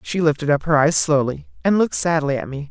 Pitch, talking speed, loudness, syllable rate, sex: 155 Hz, 245 wpm, -19 LUFS, 6.1 syllables/s, male